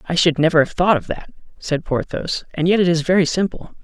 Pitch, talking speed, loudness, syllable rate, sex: 170 Hz, 235 wpm, -18 LUFS, 5.8 syllables/s, male